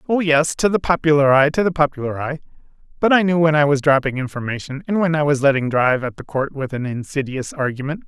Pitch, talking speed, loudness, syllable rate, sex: 145 Hz, 225 wpm, -18 LUFS, 6.2 syllables/s, male